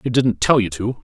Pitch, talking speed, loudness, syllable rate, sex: 110 Hz, 270 wpm, -18 LUFS, 5.4 syllables/s, male